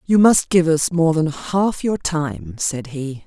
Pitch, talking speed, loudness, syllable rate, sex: 160 Hz, 200 wpm, -19 LUFS, 3.5 syllables/s, female